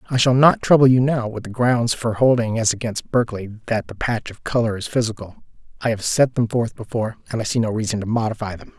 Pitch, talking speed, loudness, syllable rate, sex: 115 Hz, 240 wpm, -20 LUFS, 6.0 syllables/s, male